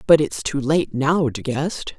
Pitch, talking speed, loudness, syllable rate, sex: 145 Hz, 210 wpm, -20 LUFS, 3.9 syllables/s, female